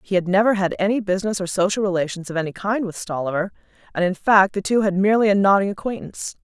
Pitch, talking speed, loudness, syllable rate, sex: 195 Hz, 225 wpm, -20 LUFS, 6.8 syllables/s, female